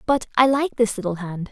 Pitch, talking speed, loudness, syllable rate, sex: 225 Hz, 235 wpm, -21 LUFS, 5.5 syllables/s, female